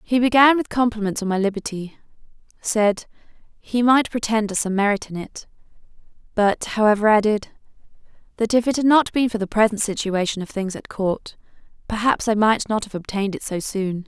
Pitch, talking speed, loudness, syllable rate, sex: 215 Hz, 180 wpm, -20 LUFS, 5.4 syllables/s, female